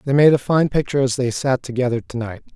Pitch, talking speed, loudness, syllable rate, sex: 130 Hz, 260 wpm, -19 LUFS, 6.5 syllables/s, male